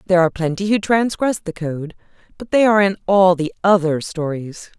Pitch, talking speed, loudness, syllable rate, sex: 185 Hz, 190 wpm, -17 LUFS, 5.6 syllables/s, female